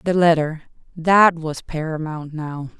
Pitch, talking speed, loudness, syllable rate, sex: 160 Hz, 105 wpm, -20 LUFS, 3.8 syllables/s, female